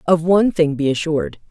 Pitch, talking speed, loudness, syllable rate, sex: 155 Hz, 200 wpm, -17 LUFS, 6.3 syllables/s, female